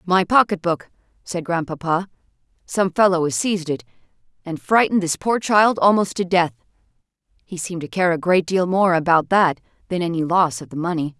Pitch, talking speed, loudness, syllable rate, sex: 175 Hz, 180 wpm, -19 LUFS, 5.4 syllables/s, female